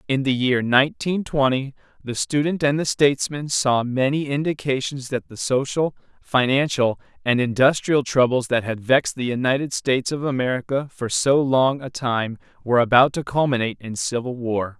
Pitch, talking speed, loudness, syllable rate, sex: 130 Hz, 160 wpm, -21 LUFS, 5.1 syllables/s, male